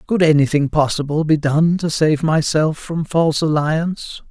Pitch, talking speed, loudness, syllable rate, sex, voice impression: 155 Hz, 155 wpm, -17 LUFS, 4.6 syllables/s, male, very masculine, slightly old, very thick, tensed, very powerful, bright, slightly soft, clear, fluent, slightly raspy, very cool, intellectual, slightly refreshing, sincere, very calm, mature, friendly, very reassuring, unique, slightly elegant, wild, sweet, lively, kind, slightly intense